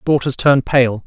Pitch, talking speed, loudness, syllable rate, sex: 130 Hz, 170 wpm, -15 LUFS, 4.1 syllables/s, male